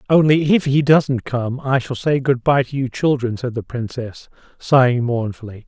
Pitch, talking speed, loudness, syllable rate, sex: 130 Hz, 190 wpm, -18 LUFS, 4.6 syllables/s, male